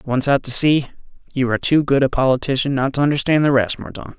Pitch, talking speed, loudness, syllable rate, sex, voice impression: 135 Hz, 230 wpm, -17 LUFS, 6.4 syllables/s, male, slightly masculine, very adult-like, slightly cool, slightly refreshing, slightly sincere, slightly unique